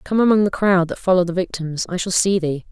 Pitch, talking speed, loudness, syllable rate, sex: 185 Hz, 245 wpm, -18 LUFS, 5.8 syllables/s, female